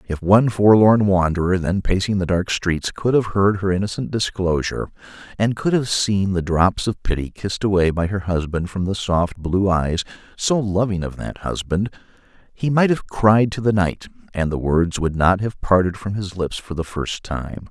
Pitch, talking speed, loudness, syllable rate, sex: 95 Hz, 195 wpm, -20 LUFS, 4.9 syllables/s, male